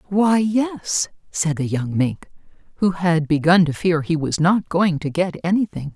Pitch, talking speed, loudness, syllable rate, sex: 175 Hz, 180 wpm, -20 LUFS, 4.2 syllables/s, female